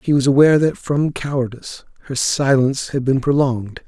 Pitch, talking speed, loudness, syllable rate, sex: 135 Hz, 170 wpm, -17 LUFS, 5.7 syllables/s, male